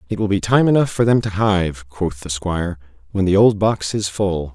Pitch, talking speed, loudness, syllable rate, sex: 95 Hz, 240 wpm, -18 LUFS, 5.0 syllables/s, male